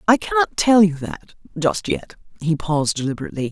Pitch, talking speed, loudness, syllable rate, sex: 170 Hz, 155 wpm, -20 LUFS, 5.8 syllables/s, female